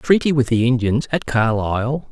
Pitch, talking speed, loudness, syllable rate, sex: 125 Hz, 170 wpm, -18 LUFS, 4.9 syllables/s, male